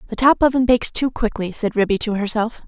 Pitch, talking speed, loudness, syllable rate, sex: 225 Hz, 225 wpm, -18 LUFS, 6.2 syllables/s, female